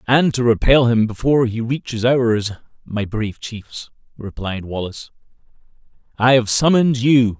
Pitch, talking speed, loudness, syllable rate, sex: 120 Hz, 140 wpm, -18 LUFS, 4.8 syllables/s, male